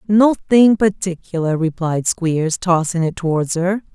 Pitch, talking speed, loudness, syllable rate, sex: 180 Hz, 120 wpm, -17 LUFS, 4.1 syllables/s, female